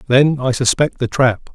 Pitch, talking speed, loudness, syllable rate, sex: 130 Hz, 195 wpm, -16 LUFS, 4.6 syllables/s, male